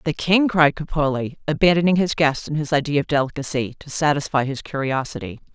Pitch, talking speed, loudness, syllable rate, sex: 150 Hz, 175 wpm, -20 LUFS, 5.8 syllables/s, female